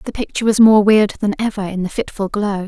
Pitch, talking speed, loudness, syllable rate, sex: 210 Hz, 245 wpm, -16 LUFS, 5.8 syllables/s, female